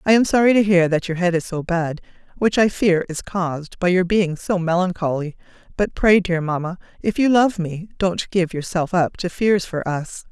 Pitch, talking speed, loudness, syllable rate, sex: 180 Hz, 215 wpm, -20 LUFS, 4.9 syllables/s, female